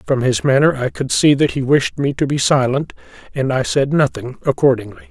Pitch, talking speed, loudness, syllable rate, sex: 135 Hz, 210 wpm, -16 LUFS, 5.4 syllables/s, male